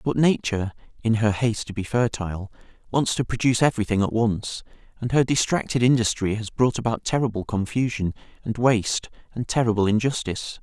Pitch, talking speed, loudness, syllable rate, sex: 115 Hz, 160 wpm, -23 LUFS, 6.0 syllables/s, male